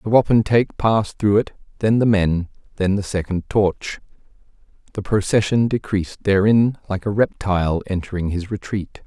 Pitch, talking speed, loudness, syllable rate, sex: 100 Hz, 145 wpm, -19 LUFS, 5.1 syllables/s, male